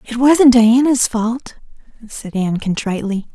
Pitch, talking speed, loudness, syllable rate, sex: 230 Hz, 125 wpm, -15 LUFS, 4.5 syllables/s, female